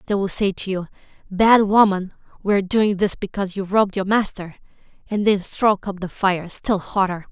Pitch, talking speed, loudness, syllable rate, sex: 195 Hz, 195 wpm, -20 LUFS, 5.4 syllables/s, female